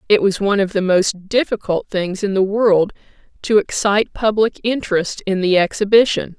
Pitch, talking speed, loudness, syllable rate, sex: 200 Hz, 170 wpm, -17 LUFS, 5.2 syllables/s, female